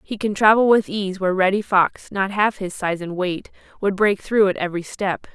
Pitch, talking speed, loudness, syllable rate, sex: 195 Hz, 225 wpm, -20 LUFS, 5.1 syllables/s, female